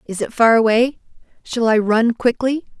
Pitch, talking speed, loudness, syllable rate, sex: 230 Hz, 170 wpm, -16 LUFS, 4.7 syllables/s, female